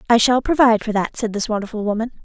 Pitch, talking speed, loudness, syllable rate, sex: 225 Hz, 240 wpm, -18 LUFS, 7.2 syllables/s, female